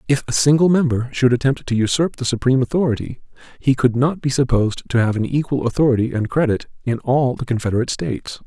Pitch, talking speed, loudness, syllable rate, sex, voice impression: 130 Hz, 200 wpm, -18 LUFS, 6.5 syllables/s, male, masculine, adult-like, slightly relaxed, slightly soft, clear, fluent, raspy, intellectual, calm, mature, reassuring, slightly lively, modest